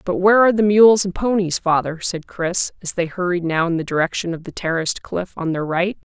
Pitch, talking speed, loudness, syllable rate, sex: 180 Hz, 235 wpm, -19 LUFS, 5.7 syllables/s, female